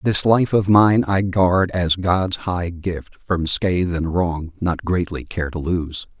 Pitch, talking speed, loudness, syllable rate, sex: 90 Hz, 185 wpm, -19 LUFS, 3.6 syllables/s, male